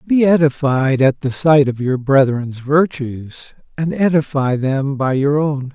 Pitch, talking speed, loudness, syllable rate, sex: 140 Hz, 155 wpm, -16 LUFS, 4.0 syllables/s, male